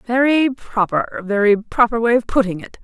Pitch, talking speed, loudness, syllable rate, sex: 225 Hz, 170 wpm, -17 LUFS, 5.3 syllables/s, female